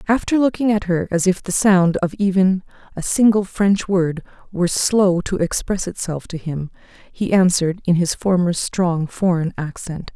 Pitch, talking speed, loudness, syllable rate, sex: 185 Hz, 170 wpm, -19 LUFS, 4.6 syllables/s, female